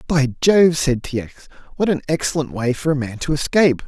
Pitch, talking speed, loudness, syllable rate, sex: 145 Hz, 215 wpm, -19 LUFS, 5.6 syllables/s, male